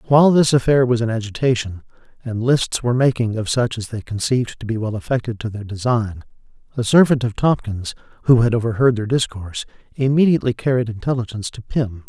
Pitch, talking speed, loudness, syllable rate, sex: 120 Hz, 180 wpm, -19 LUFS, 6.1 syllables/s, male